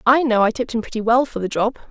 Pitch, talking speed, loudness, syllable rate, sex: 230 Hz, 315 wpm, -19 LUFS, 7.1 syllables/s, female